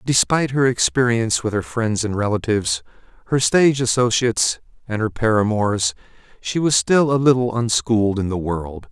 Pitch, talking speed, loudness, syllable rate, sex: 115 Hz, 155 wpm, -19 LUFS, 5.3 syllables/s, male